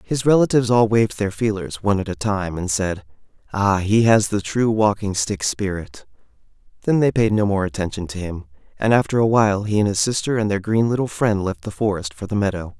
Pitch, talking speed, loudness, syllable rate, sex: 105 Hz, 220 wpm, -20 LUFS, 5.7 syllables/s, male